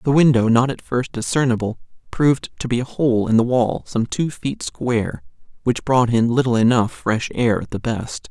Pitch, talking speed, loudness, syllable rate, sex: 120 Hz, 200 wpm, -19 LUFS, 4.9 syllables/s, male